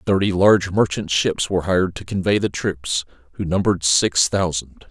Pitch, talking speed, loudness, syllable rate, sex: 90 Hz, 170 wpm, -19 LUFS, 5.2 syllables/s, male